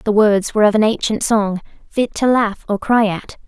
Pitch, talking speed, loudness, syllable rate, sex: 210 Hz, 225 wpm, -16 LUFS, 4.9 syllables/s, female